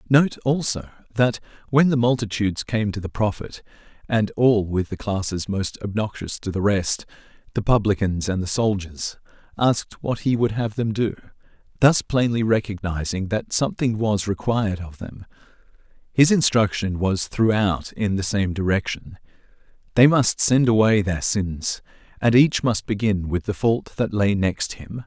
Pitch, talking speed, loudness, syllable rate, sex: 105 Hz, 155 wpm, -22 LUFS, 4.6 syllables/s, male